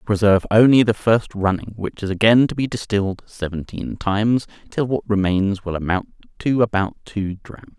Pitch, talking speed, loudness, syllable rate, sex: 105 Hz, 175 wpm, -19 LUFS, 5.2 syllables/s, male